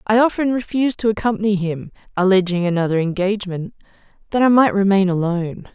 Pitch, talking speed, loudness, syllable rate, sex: 200 Hz, 145 wpm, -18 LUFS, 6.3 syllables/s, female